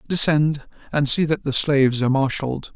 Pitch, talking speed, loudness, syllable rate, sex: 140 Hz, 175 wpm, -20 LUFS, 5.5 syllables/s, male